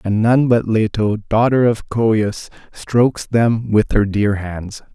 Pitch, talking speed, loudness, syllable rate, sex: 110 Hz, 160 wpm, -16 LUFS, 3.6 syllables/s, male